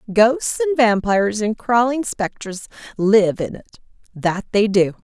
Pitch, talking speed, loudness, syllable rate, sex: 210 Hz, 130 wpm, -18 LUFS, 4.5 syllables/s, female